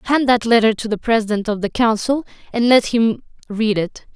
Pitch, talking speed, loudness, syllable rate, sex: 225 Hz, 200 wpm, -17 LUFS, 5.4 syllables/s, female